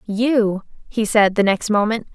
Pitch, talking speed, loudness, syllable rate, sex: 215 Hz, 170 wpm, -18 LUFS, 4.1 syllables/s, female